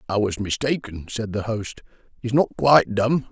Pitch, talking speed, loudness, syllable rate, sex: 115 Hz, 180 wpm, -22 LUFS, 4.9 syllables/s, male